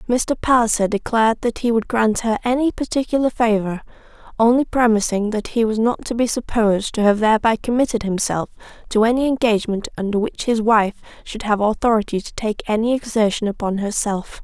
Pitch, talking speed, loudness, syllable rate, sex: 225 Hz, 165 wpm, -19 LUFS, 5.7 syllables/s, female